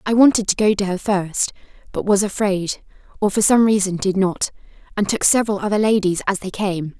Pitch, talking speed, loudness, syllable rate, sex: 200 Hz, 205 wpm, -18 LUFS, 5.5 syllables/s, female